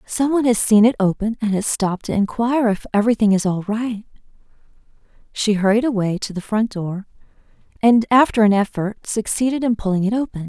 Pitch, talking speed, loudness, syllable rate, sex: 215 Hz, 185 wpm, -18 LUFS, 5.9 syllables/s, female